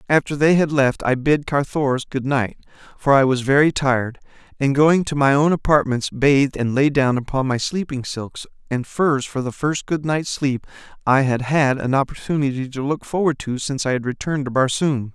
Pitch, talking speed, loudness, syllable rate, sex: 140 Hz, 200 wpm, -19 LUFS, 5.2 syllables/s, male